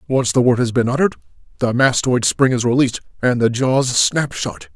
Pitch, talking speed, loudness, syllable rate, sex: 120 Hz, 200 wpm, -17 LUFS, 5.4 syllables/s, male